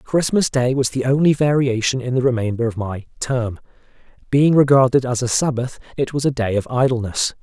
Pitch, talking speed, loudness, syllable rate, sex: 130 Hz, 185 wpm, -18 LUFS, 5.4 syllables/s, male